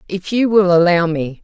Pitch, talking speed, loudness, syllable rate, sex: 180 Hz, 210 wpm, -14 LUFS, 4.8 syllables/s, female